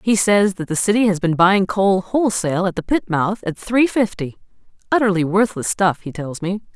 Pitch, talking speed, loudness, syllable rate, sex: 195 Hz, 195 wpm, -18 LUFS, 5.2 syllables/s, female